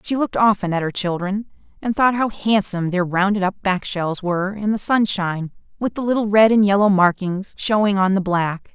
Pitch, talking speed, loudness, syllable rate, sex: 195 Hz, 205 wpm, -19 LUFS, 5.4 syllables/s, female